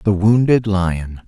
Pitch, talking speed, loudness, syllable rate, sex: 100 Hz, 140 wpm, -16 LUFS, 3.5 syllables/s, male